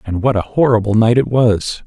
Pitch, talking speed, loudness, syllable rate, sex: 115 Hz, 225 wpm, -14 LUFS, 5.1 syllables/s, male